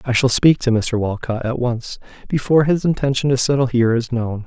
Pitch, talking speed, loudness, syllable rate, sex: 125 Hz, 215 wpm, -18 LUFS, 5.6 syllables/s, male